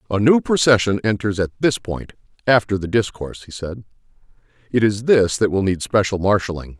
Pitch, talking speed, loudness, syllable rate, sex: 105 Hz, 175 wpm, -19 LUFS, 5.5 syllables/s, male